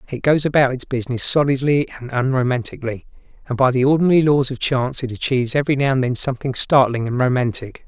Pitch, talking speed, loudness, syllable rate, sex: 130 Hz, 190 wpm, -18 LUFS, 6.7 syllables/s, male